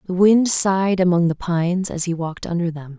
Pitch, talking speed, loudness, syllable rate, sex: 175 Hz, 220 wpm, -19 LUFS, 5.7 syllables/s, female